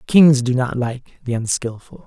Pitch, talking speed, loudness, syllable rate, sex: 130 Hz, 175 wpm, -18 LUFS, 4.3 syllables/s, male